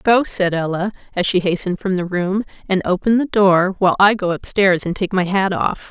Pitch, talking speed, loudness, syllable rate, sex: 190 Hz, 225 wpm, -17 LUFS, 5.3 syllables/s, female